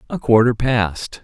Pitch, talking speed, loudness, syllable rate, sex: 120 Hz, 145 wpm, -17 LUFS, 3.8 syllables/s, male